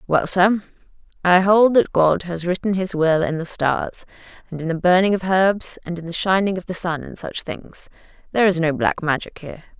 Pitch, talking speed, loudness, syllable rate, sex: 180 Hz, 215 wpm, -19 LUFS, 5.2 syllables/s, female